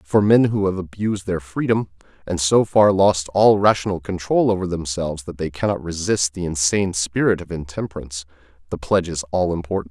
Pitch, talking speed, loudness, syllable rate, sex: 90 Hz, 180 wpm, -20 LUFS, 5.7 syllables/s, male